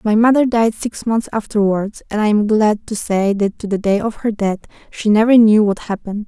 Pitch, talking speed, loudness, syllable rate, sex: 215 Hz, 230 wpm, -16 LUFS, 5.2 syllables/s, female